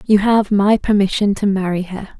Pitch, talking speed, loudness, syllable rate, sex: 200 Hz, 190 wpm, -16 LUFS, 5.1 syllables/s, female